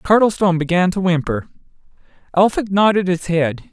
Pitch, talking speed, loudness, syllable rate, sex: 180 Hz, 130 wpm, -17 LUFS, 5.6 syllables/s, male